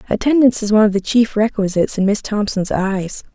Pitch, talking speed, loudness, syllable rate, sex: 210 Hz, 195 wpm, -16 LUFS, 6.2 syllables/s, female